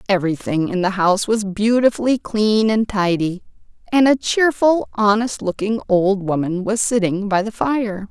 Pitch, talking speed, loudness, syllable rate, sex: 210 Hz, 155 wpm, -18 LUFS, 4.6 syllables/s, female